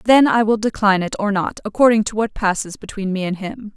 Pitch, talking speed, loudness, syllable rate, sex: 210 Hz, 240 wpm, -18 LUFS, 5.9 syllables/s, female